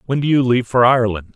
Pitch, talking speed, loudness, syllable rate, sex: 120 Hz, 265 wpm, -16 LUFS, 7.4 syllables/s, male